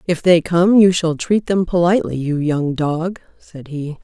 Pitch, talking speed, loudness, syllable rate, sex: 170 Hz, 195 wpm, -16 LUFS, 4.3 syllables/s, female